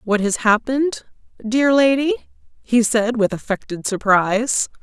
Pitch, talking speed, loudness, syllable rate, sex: 230 Hz, 125 wpm, -18 LUFS, 4.3 syllables/s, female